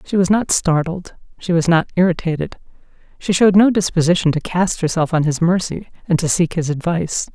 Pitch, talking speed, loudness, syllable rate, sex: 170 Hz, 190 wpm, -17 LUFS, 5.6 syllables/s, female